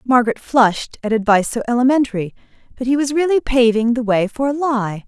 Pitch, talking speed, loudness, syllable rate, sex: 240 Hz, 190 wpm, -17 LUFS, 6.1 syllables/s, female